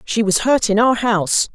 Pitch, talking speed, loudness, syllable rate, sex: 215 Hz, 235 wpm, -16 LUFS, 5.0 syllables/s, female